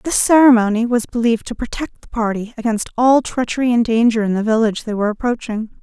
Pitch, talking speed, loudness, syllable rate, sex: 230 Hz, 195 wpm, -17 LUFS, 6.3 syllables/s, female